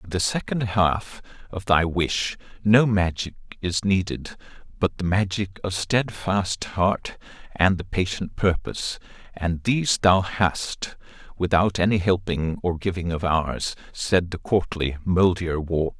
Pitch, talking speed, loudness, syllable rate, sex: 90 Hz, 140 wpm, -23 LUFS, 4.0 syllables/s, male